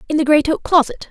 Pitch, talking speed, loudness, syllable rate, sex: 295 Hz, 270 wpm, -15 LUFS, 6.5 syllables/s, female